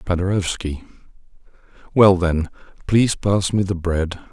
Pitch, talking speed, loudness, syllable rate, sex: 90 Hz, 110 wpm, -19 LUFS, 4.5 syllables/s, male